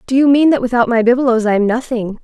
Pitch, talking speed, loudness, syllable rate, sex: 240 Hz, 240 wpm, -13 LUFS, 6.2 syllables/s, female